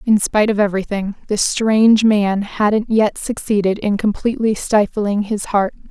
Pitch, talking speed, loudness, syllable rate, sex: 210 Hz, 150 wpm, -17 LUFS, 4.7 syllables/s, female